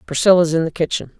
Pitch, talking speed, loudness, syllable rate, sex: 165 Hz, 200 wpm, -16 LUFS, 6.7 syllables/s, female